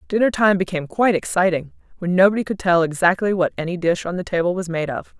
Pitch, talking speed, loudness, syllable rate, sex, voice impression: 180 Hz, 220 wpm, -19 LUFS, 6.6 syllables/s, female, feminine, adult-like, bright, clear, fluent, intellectual, calm, slightly elegant, slightly sharp